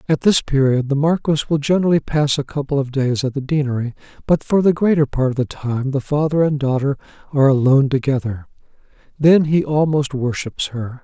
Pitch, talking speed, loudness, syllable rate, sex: 140 Hz, 190 wpm, -18 LUFS, 5.6 syllables/s, male